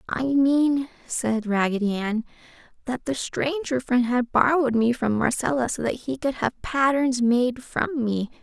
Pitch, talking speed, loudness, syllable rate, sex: 250 Hz, 165 wpm, -23 LUFS, 4.2 syllables/s, female